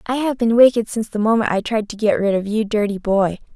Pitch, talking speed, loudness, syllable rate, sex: 215 Hz, 270 wpm, -18 LUFS, 6.1 syllables/s, female